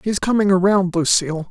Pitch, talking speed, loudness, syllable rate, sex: 185 Hz, 160 wpm, -17 LUFS, 5.7 syllables/s, female